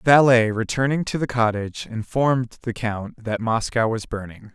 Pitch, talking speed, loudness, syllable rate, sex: 115 Hz, 170 wpm, -22 LUFS, 5.0 syllables/s, male